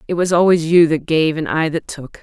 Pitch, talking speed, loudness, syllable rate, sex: 160 Hz, 270 wpm, -16 LUFS, 5.3 syllables/s, female